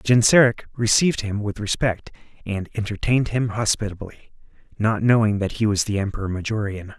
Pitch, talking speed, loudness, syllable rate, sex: 105 Hz, 145 wpm, -21 LUFS, 5.5 syllables/s, male